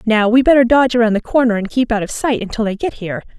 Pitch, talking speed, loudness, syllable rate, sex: 230 Hz, 285 wpm, -15 LUFS, 7.0 syllables/s, female